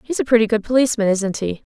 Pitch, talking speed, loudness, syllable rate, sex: 220 Hz, 245 wpm, -18 LUFS, 7.1 syllables/s, female